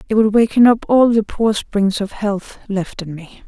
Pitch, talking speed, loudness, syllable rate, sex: 210 Hz, 225 wpm, -16 LUFS, 4.4 syllables/s, female